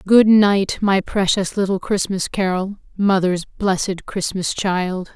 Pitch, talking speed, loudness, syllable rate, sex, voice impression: 190 Hz, 115 wpm, -19 LUFS, 3.9 syllables/s, female, very feminine, slightly young, slightly adult-like, thin, tensed, slightly powerful, bright, hard, very clear, fluent, slightly cool, intellectual, refreshing, slightly sincere, slightly calm, very unique, elegant, slightly sweet, slightly lively, strict, intense, very sharp